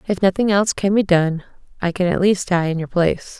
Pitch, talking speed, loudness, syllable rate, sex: 185 Hz, 250 wpm, -18 LUFS, 5.9 syllables/s, female